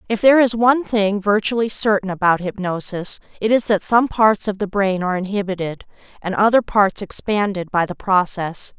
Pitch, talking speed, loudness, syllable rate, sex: 200 Hz, 180 wpm, -18 LUFS, 5.2 syllables/s, female